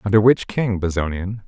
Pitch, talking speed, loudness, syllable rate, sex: 100 Hz, 165 wpm, -20 LUFS, 5.1 syllables/s, male